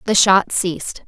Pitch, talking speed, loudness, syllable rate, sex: 190 Hz, 165 wpm, -16 LUFS, 4.4 syllables/s, female